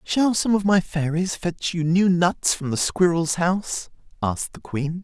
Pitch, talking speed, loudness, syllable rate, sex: 175 Hz, 190 wpm, -22 LUFS, 4.3 syllables/s, male